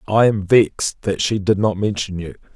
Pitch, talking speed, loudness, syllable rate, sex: 100 Hz, 210 wpm, -18 LUFS, 5.1 syllables/s, male